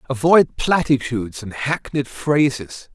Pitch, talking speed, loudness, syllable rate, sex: 135 Hz, 100 wpm, -19 LUFS, 4.0 syllables/s, male